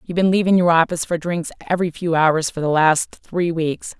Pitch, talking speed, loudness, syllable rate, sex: 165 Hz, 225 wpm, -19 LUFS, 5.4 syllables/s, female